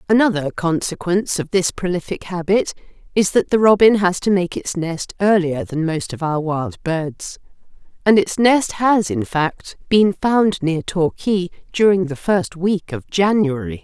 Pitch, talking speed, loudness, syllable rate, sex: 180 Hz, 165 wpm, -18 LUFS, 4.3 syllables/s, female